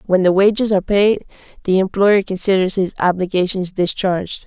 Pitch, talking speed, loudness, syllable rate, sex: 190 Hz, 150 wpm, -16 LUFS, 5.4 syllables/s, female